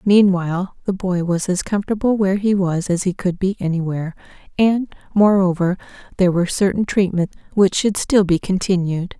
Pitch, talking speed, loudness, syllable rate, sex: 190 Hz, 165 wpm, -18 LUFS, 5.4 syllables/s, female